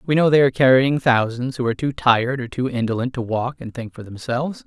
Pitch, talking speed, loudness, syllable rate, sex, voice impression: 125 Hz, 245 wpm, -19 LUFS, 6.2 syllables/s, male, masculine, middle-aged, tensed, powerful, bright, clear, cool, intellectual, friendly, reassuring, unique, wild, lively, kind